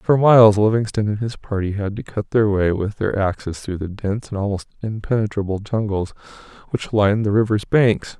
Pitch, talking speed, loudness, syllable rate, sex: 105 Hz, 190 wpm, -19 LUFS, 5.5 syllables/s, male